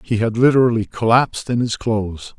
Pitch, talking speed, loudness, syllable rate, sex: 115 Hz, 175 wpm, -17 LUFS, 5.8 syllables/s, male